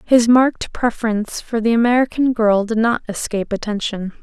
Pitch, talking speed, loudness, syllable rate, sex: 225 Hz, 155 wpm, -18 LUFS, 5.5 syllables/s, female